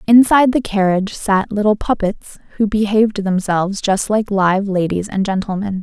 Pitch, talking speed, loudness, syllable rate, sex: 200 Hz, 155 wpm, -16 LUFS, 5.1 syllables/s, female